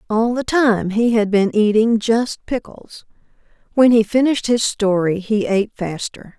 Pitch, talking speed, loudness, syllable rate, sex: 220 Hz, 160 wpm, -17 LUFS, 4.4 syllables/s, female